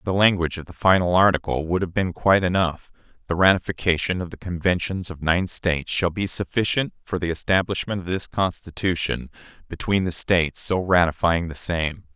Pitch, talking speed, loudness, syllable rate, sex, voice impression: 90 Hz, 175 wpm, -22 LUFS, 5.5 syllables/s, male, very masculine, very adult-like, middle-aged, very thick, very tensed, very powerful, bright, slightly soft, slightly muffled, fluent, very cool, very intellectual, slightly refreshing, very sincere, very calm, very mature, friendly, reassuring, elegant, lively, kind